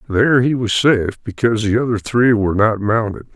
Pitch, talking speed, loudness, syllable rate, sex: 110 Hz, 195 wpm, -16 LUFS, 5.8 syllables/s, male